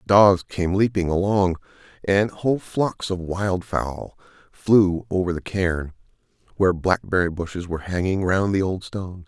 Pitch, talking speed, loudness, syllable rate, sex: 95 Hz, 155 wpm, -22 LUFS, 4.7 syllables/s, male